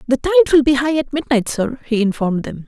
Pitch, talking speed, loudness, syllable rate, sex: 260 Hz, 245 wpm, -16 LUFS, 6.2 syllables/s, female